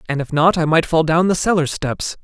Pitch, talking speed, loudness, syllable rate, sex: 160 Hz, 270 wpm, -17 LUFS, 5.4 syllables/s, male